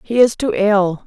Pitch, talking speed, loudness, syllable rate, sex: 210 Hz, 225 wpm, -15 LUFS, 4.2 syllables/s, female